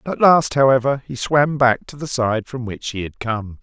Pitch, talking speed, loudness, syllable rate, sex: 130 Hz, 230 wpm, -18 LUFS, 4.6 syllables/s, male